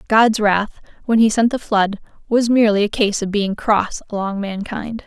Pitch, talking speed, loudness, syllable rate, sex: 210 Hz, 190 wpm, -18 LUFS, 4.7 syllables/s, female